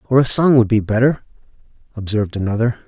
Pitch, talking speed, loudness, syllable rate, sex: 115 Hz, 165 wpm, -16 LUFS, 6.5 syllables/s, male